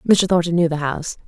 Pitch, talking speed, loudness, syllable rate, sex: 170 Hz, 235 wpm, -19 LUFS, 6.8 syllables/s, female